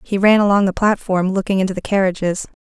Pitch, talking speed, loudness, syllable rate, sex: 195 Hz, 205 wpm, -17 LUFS, 6.3 syllables/s, female